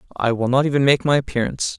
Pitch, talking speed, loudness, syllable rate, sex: 130 Hz, 235 wpm, -19 LUFS, 7.5 syllables/s, male